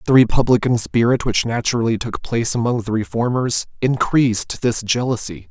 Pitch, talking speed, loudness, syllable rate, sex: 120 Hz, 140 wpm, -18 LUFS, 5.4 syllables/s, male